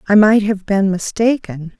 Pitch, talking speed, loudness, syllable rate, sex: 200 Hz, 165 wpm, -15 LUFS, 4.5 syllables/s, female